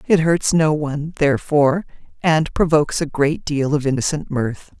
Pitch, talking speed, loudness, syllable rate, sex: 150 Hz, 165 wpm, -18 LUFS, 5.0 syllables/s, female